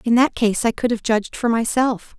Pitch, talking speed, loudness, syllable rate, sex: 230 Hz, 250 wpm, -19 LUFS, 5.3 syllables/s, female